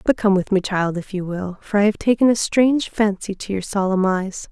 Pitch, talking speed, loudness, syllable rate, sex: 200 Hz, 255 wpm, -20 LUFS, 5.3 syllables/s, female